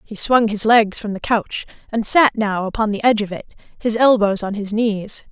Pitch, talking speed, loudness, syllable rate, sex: 215 Hz, 225 wpm, -18 LUFS, 5.0 syllables/s, female